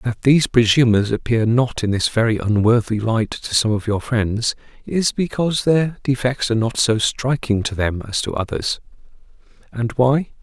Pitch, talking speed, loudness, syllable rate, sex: 115 Hz, 165 wpm, -19 LUFS, 4.8 syllables/s, male